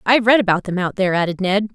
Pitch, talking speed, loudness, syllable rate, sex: 200 Hz, 275 wpm, -17 LUFS, 7.4 syllables/s, female